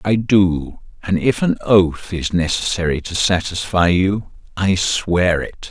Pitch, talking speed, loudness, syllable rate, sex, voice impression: 90 Hz, 145 wpm, -17 LUFS, 3.7 syllables/s, male, very masculine, adult-like, middle-aged, very thick, tensed, powerful, slightly dark, slightly soft, slightly muffled, slightly fluent, slightly raspy, very cool, intellectual, sincere, calm, very mature, friendly, reassuring, very unique, slightly elegant, very wild, sweet, kind, slightly modest